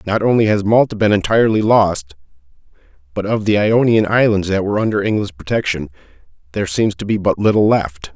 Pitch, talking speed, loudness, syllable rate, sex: 100 Hz, 175 wpm, -16 LUFS, 5.9 syllables/s, male